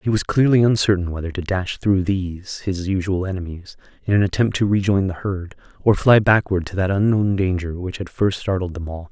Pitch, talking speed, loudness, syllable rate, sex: 95 Hz, 210 wpm, -20 LUFS, 5.4 syllables/s, male